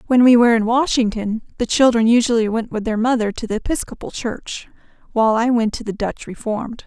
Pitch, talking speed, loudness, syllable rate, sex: 230 Hz, 200 wpm, -18 LUFS, 5.9 syllables/s, female